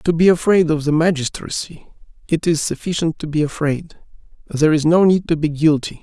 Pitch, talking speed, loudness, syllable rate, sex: 160 Hz, 190 wpm, -17 LUFS, 5.5 syllables/s, male